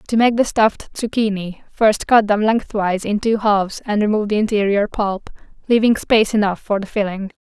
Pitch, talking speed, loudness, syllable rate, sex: 210 Hz, 185 wpm, -18 LUFS, 5.5 syllables/s, female